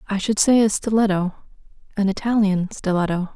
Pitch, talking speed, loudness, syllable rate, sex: 200 Hz, 125 wpm, -20 LUFS, 5.7 syllables/s, female